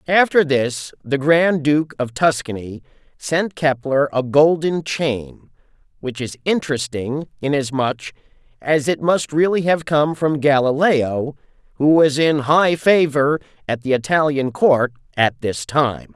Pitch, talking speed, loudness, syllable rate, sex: 145 Hz, 135 wpm, -18 LUFS, 4.0 syllables/s, male